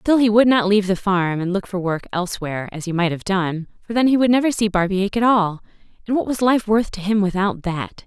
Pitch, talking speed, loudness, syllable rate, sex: 200 Hz, 260 wpm, -19 LUFS, 5.8 syllables/s, female